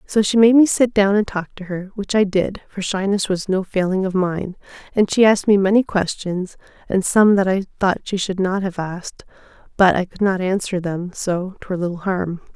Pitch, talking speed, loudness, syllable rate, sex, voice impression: 190 Hz, 220 wpm, -19 LUFS, 5.1 syllables/s, female, very feminine, slightly young, slightly adult-like, very thin, very relaxed, very weak, dark, very soft, muffled, slightly halting, slightly raspy, very cute, intellectual, slightly refreshing, very sincere, very calm, very friendly, very reassuring, unique, very elegant, sweet, very kind, very modest